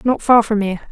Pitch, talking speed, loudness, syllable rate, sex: 220 Hz, 265 wpm, -15 LUFS, 6.9 syllables/s, female